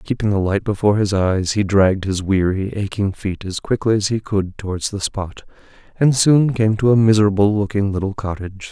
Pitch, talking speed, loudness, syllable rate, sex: 100 Hz, 200 wpm, -18 LUFS, 5.5 syllables/s, male